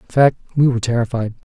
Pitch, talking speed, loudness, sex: 125 Hz, 200 wpm, -18 LUFS, male